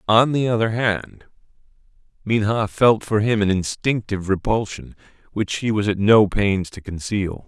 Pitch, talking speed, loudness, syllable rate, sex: 105 Hz, 155 wpm, -20 LUFS, 4.6 syllables/s, male